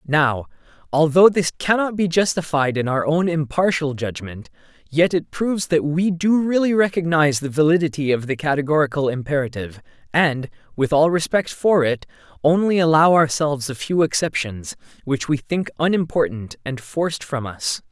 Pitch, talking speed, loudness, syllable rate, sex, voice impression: 155 Hz, 150 wpm, -19 LUFS, 5.0 syllables/s, male, very masculine, very adult-like, slightly thick, tensed, slightly powerful, bright, slightly soft, clear, fluent, slightly raspy, cool, intellectual, very refreshing, sincere, calm, slightly mature, very friendly, reassuring, unique, elegant, slightly wild, sweet, lively, kind